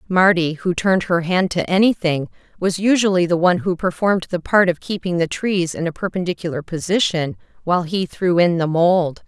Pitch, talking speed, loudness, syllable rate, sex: 180 Hz, 190 wpm, -18 LUFS, 5.4 syllables/s, female